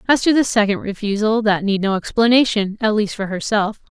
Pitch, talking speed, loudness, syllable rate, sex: 215 Hz, 195 wpm, -18 LUFS, 5.8 syllables/s, female